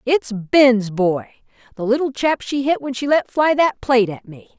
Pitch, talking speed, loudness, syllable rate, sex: 245 Hz, 195 wpm, -18 LUFS, 4.6 syllables/s, female